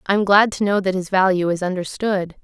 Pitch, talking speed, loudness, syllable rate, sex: 190 Hz, 245 wpm, -18 LUFS, 5.7 syllables/s, female